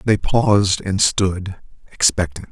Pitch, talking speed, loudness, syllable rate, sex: 95 Hz, 120 wpm, -18 LUFS, 3.8 syllables/s, male